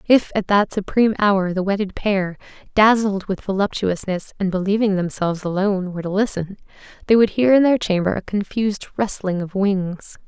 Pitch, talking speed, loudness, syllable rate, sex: 195 Hz, 170 wpm, -20 LUFS, 5.4 syllables/s, female